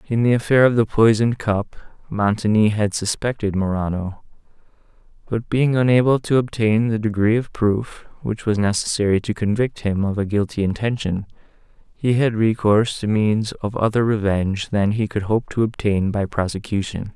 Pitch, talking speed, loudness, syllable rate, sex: 110 Hz, 160 wpm, -20 LUFS, 5.1 syllables/s, male